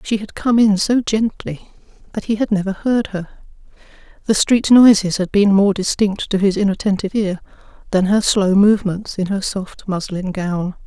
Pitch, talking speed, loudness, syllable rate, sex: 200 Hz, 175 wpm, -17 LUFS, 4.8 syllables/s, female